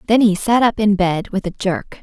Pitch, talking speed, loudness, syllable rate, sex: 205 Hz, 265 wpm, -17 LUFS, 4.9 syllables/s, female